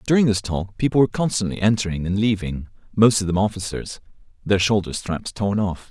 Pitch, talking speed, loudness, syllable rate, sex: 100 Hz, 175 wpm, -21 LUFS, 5.7 syllables/s, male